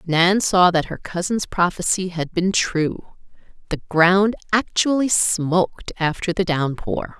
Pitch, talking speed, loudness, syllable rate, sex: 180 Hz, 135 wpm, -19 LUFS, 3.8 syllables/s, female